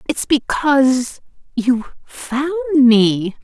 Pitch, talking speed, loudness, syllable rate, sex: 260 Hz, 70 wpm, -16 LUFS, 2.9 syllables/s, female